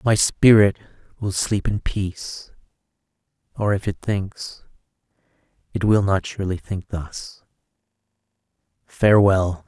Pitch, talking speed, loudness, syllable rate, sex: 95 Hz, 105 wpm, -21 LUFS, 4.1 syllables/s, male